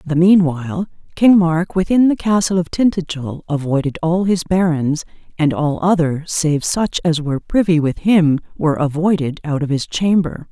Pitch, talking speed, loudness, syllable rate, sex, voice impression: 165 Hz, 165 wpm, -16 LUFS, 4.8 syllables/s, female, feminine, slightly gender-neutral, adult-like, middle-aged, thin, slightly relaxed, slightly weak, slightly dark, soft, slightly muffled, fluent, cool, very intellectual, refreshing, sincere, very calm, friendly, reassuring, slightly unique, elegant, sweet, slightly lively, very kind, modest